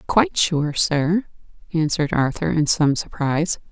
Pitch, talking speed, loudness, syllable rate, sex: 160 Hz, 130 wpm, -20 LUFS, 4.6 syllables/s, female